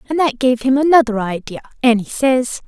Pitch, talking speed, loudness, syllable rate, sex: 250 Hz, 200 wpm, -16 LUFS, 5.3 syllables/s, female